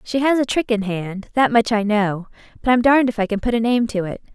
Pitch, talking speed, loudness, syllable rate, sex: 225 Hz, 275 wpm, -19 LUFS, 5.8 syllables/s, female